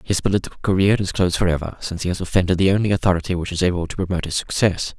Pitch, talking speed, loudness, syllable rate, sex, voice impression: 90 Hz, 240 wpm, -20 LUFS, 7.9 syllables/s, male, masculine, adult-like, slightly thin, slightly weak, slightly hard, fluent, slightly cool, calm, slightly strict, sharp